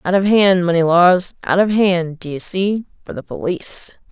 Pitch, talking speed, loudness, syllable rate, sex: 180 Hz, 145 wpm, -16 LUFS, 4.4 syllables/s, female